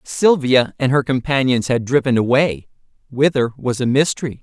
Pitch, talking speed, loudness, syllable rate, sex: 130 Hz, 135 wpm, -17 LUFS, 5.0 syllables/s, male